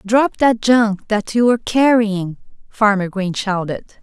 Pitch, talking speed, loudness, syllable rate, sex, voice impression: 215 Hz, 135 wpm, -16 LUFS, 3.8 syllables/s, female, very feminine, adult-like, slightly middle-aged, very thin, slightly relaxed, slightly weak, slightly dark, slightly soft, very clear, fluent, cute, intellectual, refreshing, sincere, slightly calm, reassuring, very unique, very elegant, sweet, very kind, slightly modest